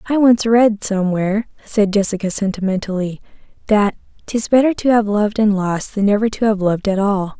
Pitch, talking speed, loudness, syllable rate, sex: 205 Hz, 180 wpm, -17 LUFS, 5.6 syllables/s, female